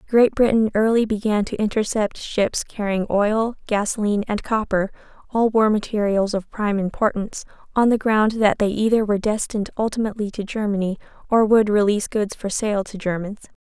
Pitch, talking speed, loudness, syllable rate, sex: 210 Hz, 155 wpm, -21 LUFS, 5.5 syllables/s, female